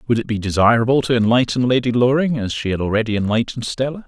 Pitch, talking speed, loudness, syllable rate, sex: 120 Hz, 205 wpm, -18 LUFS, 6.9 syllables/s, male